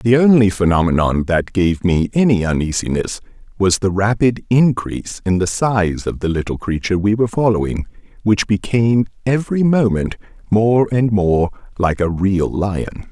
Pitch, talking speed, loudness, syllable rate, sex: 105 Hz, 150 wpm, -17 LUFS, 4.9 syllables/s, male